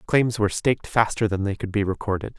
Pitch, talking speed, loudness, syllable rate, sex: 105 Hz, 225 wpm, -23 LUFS, 6.3 syllables/s, male